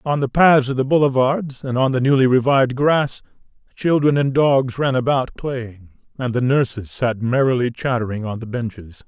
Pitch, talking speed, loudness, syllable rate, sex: 130 Hz, 180 wpm, -18 LUFS, 5.0 syllables/s, male